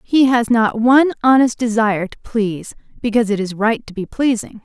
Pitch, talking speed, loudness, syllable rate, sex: 230 Hz, 195 wpm, -16 LUFS, 5.5 syllables/s, female